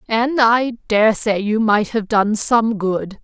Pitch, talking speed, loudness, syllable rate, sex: 220 Hz, 185 wpm, -17 LUFS, 3.3 syllables/s, female